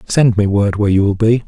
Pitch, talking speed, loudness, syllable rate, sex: 105 Hz, 285 wpm, -14 LUFS, 6.1 syllables/s, male